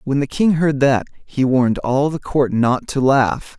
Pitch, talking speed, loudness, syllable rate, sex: 135 Hz, 220 wpm, -17 LUFS, 4.1 syllables/s, male